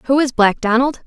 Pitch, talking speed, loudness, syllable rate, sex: 250 Hz, 225 wpm, -15 LUFS, 5.0 syllables/s, female